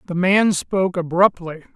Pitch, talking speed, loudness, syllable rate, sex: 180 Hz, 135 wpm, -18 LUFS, 5.0 syllables/s, male